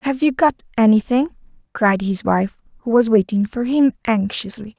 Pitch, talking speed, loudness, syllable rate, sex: 230 Hz, 165 wpm, -18 LUFS, 4.9 syllables/s, female